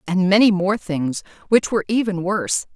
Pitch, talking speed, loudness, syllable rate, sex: 195 Hz, 175 wpm, -19 LUFS, 5.3 syllables/s, female